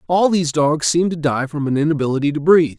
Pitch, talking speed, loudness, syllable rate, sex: 155 Hz, 215 wpm, -17 LUFS, 6.5 syllables/s, male